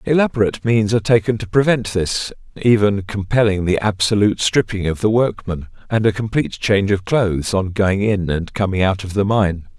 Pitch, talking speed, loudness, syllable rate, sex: 105 Hz, 185 wpm, -18 LUFS, 5.5 syllables/s, male